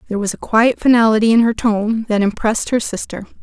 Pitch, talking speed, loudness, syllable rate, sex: 220 Hz, 210 wpm, -16 LUFS, 6.2 syllables/s, female